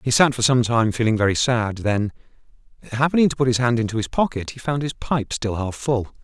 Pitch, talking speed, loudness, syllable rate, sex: 120 Hz, 230 wpm, -21 LUFS, 5.7 syllables/s, male